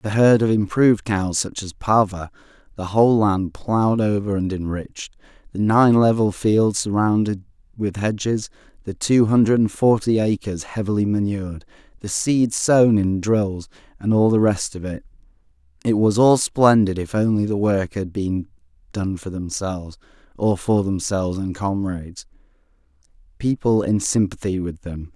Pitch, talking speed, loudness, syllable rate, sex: 100 Hz, 150 wpm, -20 LUFS, 4.7 syllables/s, male